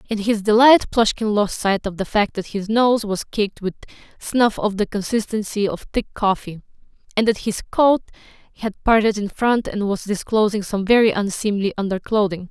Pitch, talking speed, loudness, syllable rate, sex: 210 Hz, 175 wpm, -19 LUFS, 5.0 syllables/s, female